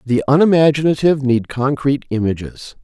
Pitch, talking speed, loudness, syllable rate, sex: 135 Hz, 105 wpm, -16 LUFS, 5.8 syllables/s, male